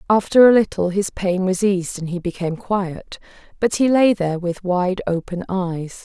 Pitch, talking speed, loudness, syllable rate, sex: 190 Hz, 190 wpm, -19 LUFS, 4.9 syllables/s, female